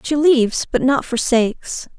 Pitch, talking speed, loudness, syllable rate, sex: 260 Hz, 150 wpm, -17 LUFS, 4.6 syllables/s, female